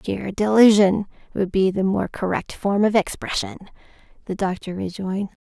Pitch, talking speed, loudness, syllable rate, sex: 195 Hz, 145 wpm, -21 LUFS, 4.6 syllables/s, female